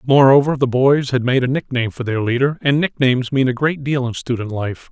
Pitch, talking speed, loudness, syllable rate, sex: 130 Hz, 230 wpm, -17 LUFS, 5.7 syllables/s, male